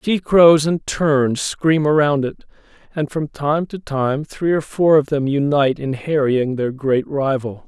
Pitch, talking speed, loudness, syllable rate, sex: 145 Hz, 180 wpm, -18 LUFS, 4.0 syllables/s, male